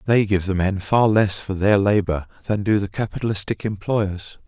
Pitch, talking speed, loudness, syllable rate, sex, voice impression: 100 Hz, 190 wpm, -21 LUFS, 4.9 syllables/s, male, masculine, middle-aged, tensed, bright, soft, raspy, cool, intellectual, sincere, calm, friendly, reassuring, wild, lively, kind